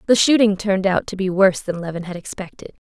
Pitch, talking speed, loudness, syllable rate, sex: 190 Hz, 230 wpm, -19 LUFS, 6.6 syllables/s, female